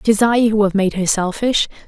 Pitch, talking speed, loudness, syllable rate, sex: 210 Hz, 255 wpm, -16 LUFS, 5.4 syllables/s, female